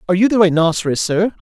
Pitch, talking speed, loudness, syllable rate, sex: 185 Hz, 205 wpm, -15 LUFS, 7.4 syllables/s, male